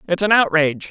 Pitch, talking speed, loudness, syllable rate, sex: 175 Hz, 200 wpm, -16 LUFS, 6.9 syllables/s, male